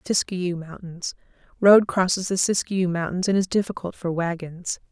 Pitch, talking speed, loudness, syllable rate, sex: 180 Hz, 135 wpm, -23 LUFS, 4.8 syllables/s, female